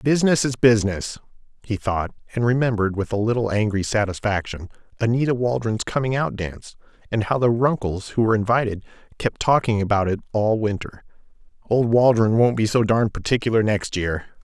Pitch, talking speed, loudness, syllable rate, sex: 110 Hz, 160 wpm, -21 LUFS, 5.7 syllables/s, male